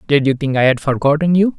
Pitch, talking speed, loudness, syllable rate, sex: 145 Hz, 265 wpm, -15 LUFS, 6.3 syllables/s, male